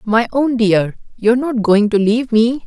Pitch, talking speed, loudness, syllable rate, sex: 230 Hz, 205 wpm, -15 LUFS, 4.8 syllables/s, male